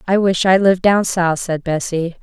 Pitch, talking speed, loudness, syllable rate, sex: 180 Hz, 215 wpm, -16 LUFS, 4.9 syllables/s, female